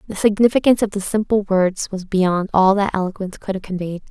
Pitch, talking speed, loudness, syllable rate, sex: 195 Hz, 205 wpm, -18 LUFS, 6.1 syllables/s, female